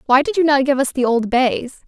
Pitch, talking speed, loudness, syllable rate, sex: 270 Hz, 290 wpm, -17 LUFS, 5.5 syllables/s, female